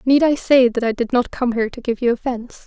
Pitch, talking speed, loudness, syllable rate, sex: 245 Hz, 290 wpm, -18 LUFS, 6.2 syllables/s, female